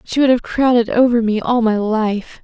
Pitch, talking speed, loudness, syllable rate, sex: 230 Hz, 220 wpm, -15 LUFS, 4.7 syllables/s, female